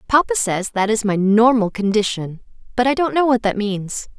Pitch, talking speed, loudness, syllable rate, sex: 220 Hz, 200 wpm, -18 LUFS, 5.0 syllables/s, female